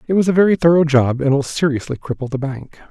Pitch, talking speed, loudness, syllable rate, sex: 145 Hz, 250 wpm, -17 LUFS, 6.5 syllables/s, male